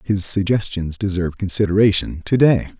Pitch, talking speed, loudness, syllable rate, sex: 95 Hz, 130 wpm, -18 LUFS, 5.4 syllables/s, male